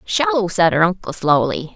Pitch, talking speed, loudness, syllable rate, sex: 170 Hz, 170 wpm, -17 LUFS, 4.3 syllables/s, female